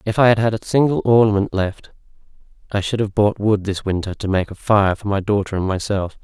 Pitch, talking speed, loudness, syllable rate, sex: 105 Hz, 230 wpm, -19 LUFS, 5.7 syllables/s, male